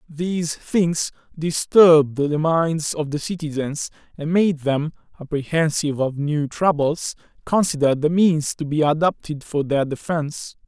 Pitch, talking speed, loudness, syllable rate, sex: 155 Hz, 135 wpm, -20 LUFS, 4.3 syllables/s, male